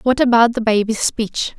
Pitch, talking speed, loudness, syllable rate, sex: 230 Hz, 190 wpm, -16 LUFS, 4.9 syllables/s, female